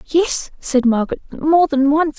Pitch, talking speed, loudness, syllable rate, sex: 295 Hz, 165 wpm, -17 LUFS, 4.4 syllables/s, female